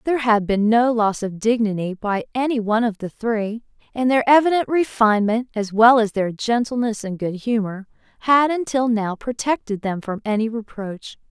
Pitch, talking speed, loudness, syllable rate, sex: 225 Hz, 175 wpm, -20 LUFS, 5.0 syllables/s, female